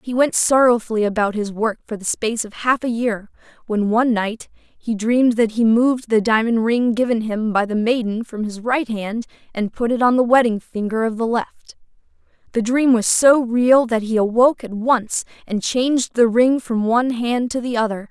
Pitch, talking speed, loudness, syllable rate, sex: 230 Hz, 210 wpm, -18 LUFS, 5.0 syllables/s, female